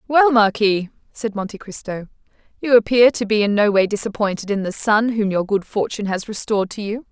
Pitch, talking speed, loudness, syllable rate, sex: 210 Hz, 200 wpm, -19 LUFS, 5.7 syllables/s, female